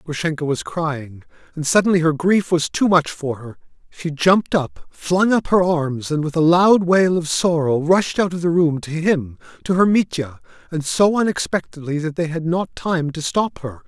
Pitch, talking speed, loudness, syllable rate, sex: 165 Hz, 205 wpm, -18 LUFS, 4.6 syllables/s, male